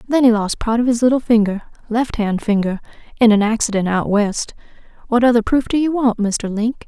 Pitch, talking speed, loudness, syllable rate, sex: 225 Hz, 190 wpm, -17 LUFS, 5.4 syllables/s, female